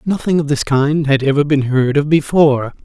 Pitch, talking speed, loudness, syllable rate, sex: 145 Hz, 210 wpm, -14 LUFS, 5.3 syllables/s, male